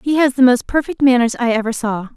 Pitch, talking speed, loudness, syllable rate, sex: 250 Hz, 250 wpm, -15 LUFS, 6.0 syllables/s, female